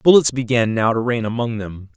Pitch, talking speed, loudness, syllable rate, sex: 115 Hz, 215 wpm, -18 LUFS, 5.5 syllables/s, male